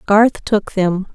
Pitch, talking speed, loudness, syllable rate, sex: 200 Hz, 160 wpm, -16 LUFS, 3.1 syllables/s, female